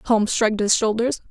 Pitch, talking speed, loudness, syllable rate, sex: 220 Hz, 185 wpm, -20 LUFS, 5.8 syllables/s, female